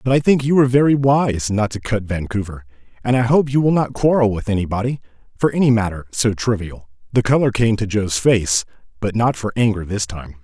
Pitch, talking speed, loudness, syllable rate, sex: 115 Hz, 215 wpm, -18 LUFS, 5.6 syllables/s, male